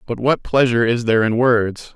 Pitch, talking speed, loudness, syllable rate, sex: 120 Hz, 215 wpm, -17 LUFS, 5.7 syllables/s, male